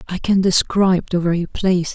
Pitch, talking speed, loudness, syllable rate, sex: 180 Hz, 185 wpm, -17 LUFS, 5.8 syllables/s, female